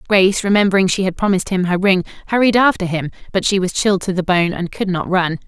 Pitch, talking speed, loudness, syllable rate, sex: 190 Hz, 240 wpm, -16 LUFS, 6.5 syllables/s, female